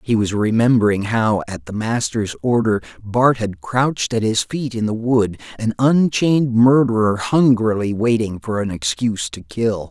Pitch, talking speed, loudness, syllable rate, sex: 115 Hz, 165 wpm, -18 LUFS, 4.5 syllables/s, male